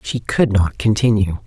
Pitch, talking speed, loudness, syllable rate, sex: 105 Hz, 165 wpm, -17 LUFS, 4.4 syllables/s, female